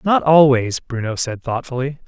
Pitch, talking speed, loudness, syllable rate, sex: 135 Hz, 145 wpm, -17 LUFS, 4.7 syllables/s, male